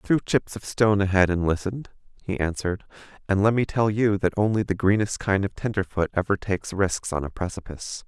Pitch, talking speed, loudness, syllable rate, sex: 100 Hz, 200 wpm, -24 LUFS, 5.9 syllables/s, male